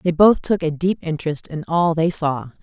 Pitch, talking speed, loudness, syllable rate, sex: 160 Hz, 230 wpm, -19 LUFS, 5.0 syllables/s, female